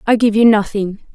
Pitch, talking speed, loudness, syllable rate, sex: 215 Hz, 210 wpm, -14 LUFS, 5.4 syllables/s, female